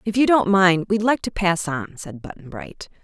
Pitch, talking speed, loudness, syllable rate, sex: 185 Hz, 235 wpm, -19 LUFS, 4.7 syllables/s, female